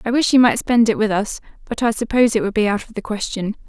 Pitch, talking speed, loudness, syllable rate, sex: 220 Hz, 295 wpm, -18 LUFS, 6.4 syllables/s, female